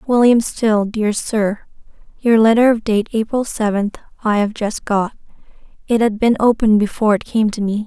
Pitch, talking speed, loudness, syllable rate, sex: 220 Hz, 170 wpm, -16 LUFS, 5.0 syllables/s, female